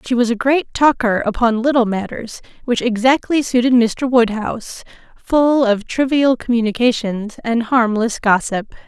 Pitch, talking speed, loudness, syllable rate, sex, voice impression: 240 Hz, 135 wpm, -16 LUFS, 4.6 syllables/s, female, feminine, adult-like, tensed, powerful, bright, clear, intellectual, friendly, lively, slightly sharp